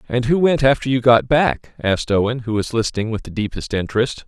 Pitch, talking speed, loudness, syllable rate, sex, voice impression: 120 Hz, 225 wpm, -18 LUFS, 5.9 syllables/s, male, masculine, adult-like, slightly thick, cool, sincere, slightly friendly, slightly reassuring